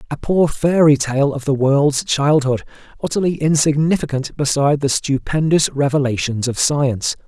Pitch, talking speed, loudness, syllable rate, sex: 145 Hz, 130 wpm, -17 LUFS, 4.9 syllables/s, male